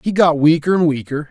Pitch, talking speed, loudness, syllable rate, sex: 160 Hz, 230 wpm, -15 LUFS, 5.8 syllables/s, male